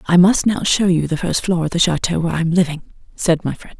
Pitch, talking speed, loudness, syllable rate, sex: 175 Hz, 285 wpm, -17 LUFS, 6.3 syllables/s, female